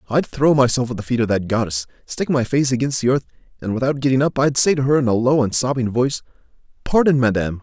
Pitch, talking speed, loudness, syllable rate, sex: 130 Hz, 245 wpm, -18 LUFS, 6.5 syllables/s, male